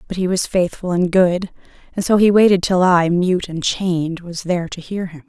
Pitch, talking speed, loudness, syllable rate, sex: 180 Hz, 225 wpm, -17 LUFS, 5.1 syllables/s, female